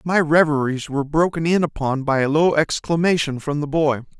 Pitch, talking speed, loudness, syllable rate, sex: 150 Hz, 185 wpm, -19 LUFS, 5.3 syllables/s, male